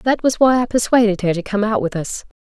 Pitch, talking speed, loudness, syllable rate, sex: 220 Hz, 270 wpm, -17 LUFS, 5.8 syllables/s, female